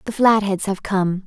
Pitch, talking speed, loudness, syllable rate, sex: 200 Hz, 190 wpm, -19 LUFS, 4.4 syllables/s, female